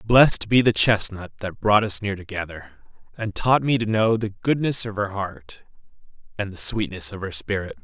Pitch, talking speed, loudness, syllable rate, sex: 105 Hz, 190 wpm, -22 LUFS, 5.0 syllables/s, male